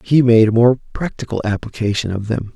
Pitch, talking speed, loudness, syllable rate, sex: 115 Hz, 190 wpm, -17 LUFS, 5.6 syllables/s, male